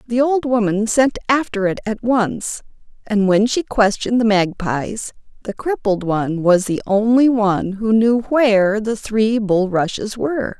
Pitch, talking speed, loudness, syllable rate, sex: 220 Hz, 160 wpm, -17 LUFS, 4.3 syllables/s, female